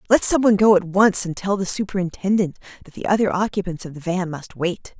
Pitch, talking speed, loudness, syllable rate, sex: 190 Hz, 230 wpm, -20 LUFS, 6.0 syllables/s, female